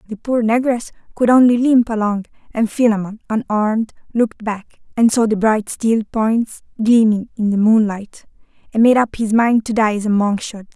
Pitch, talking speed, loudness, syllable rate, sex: 220 Hz, 185 wpm, -16 LUFS, 4.8 syllables/s, female